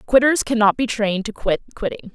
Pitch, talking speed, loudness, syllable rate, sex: 230 Hz, 195 wpm, -19 LUFS, 5.8 syllables/s, female